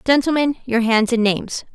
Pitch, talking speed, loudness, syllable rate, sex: 245 Hz, 170 wpm, -18 LUFS, 5.6 syllables/s, female